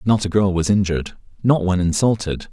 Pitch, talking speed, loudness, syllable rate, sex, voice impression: 95 Hz, 190 wpm, -19 LUFS, 6.1 syllables/s, male, very masculine, very adult-like, middle-aged, very thick, tensed, powerful, bright, soft, very clear, very fluent, very cool, very intellectual, slightly refreshing, very sincere, very calm, very mature, very friendly, very reassuring, very unique, elegant, wild, very sweet, slightly lively, very kind, slightly modest